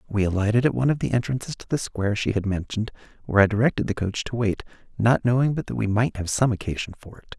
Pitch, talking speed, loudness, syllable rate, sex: 110 Hz, 250 wpm, -24 LUFS, 7.1 syllables/s, male